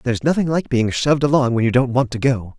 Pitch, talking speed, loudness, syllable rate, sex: 130 Hz, 280 wpm, -18 LUFS, 6.5 syllables/s, male